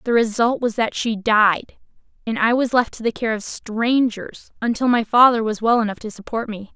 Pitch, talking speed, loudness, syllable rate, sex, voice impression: 225 Hz, 215 wpm, -19 LUFS, 5.0 syllables/s, female, very feminine, very young, very thin, tensed, slightly powerful, very bright, slightly soft, very clear, slightly fluent, very cute, slightly cool, intellectual, very refreshing, sincere, slightly calm, friendly, reassuring, slightly unique, elegant, slightly sweet, very lively, kind, slightly intense